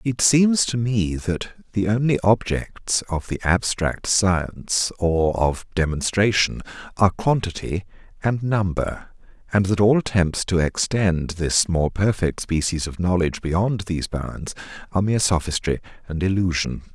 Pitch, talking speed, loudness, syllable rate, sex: 95 Hz, 140 wpm, -21 LUFS, 4.3 syllables/s, male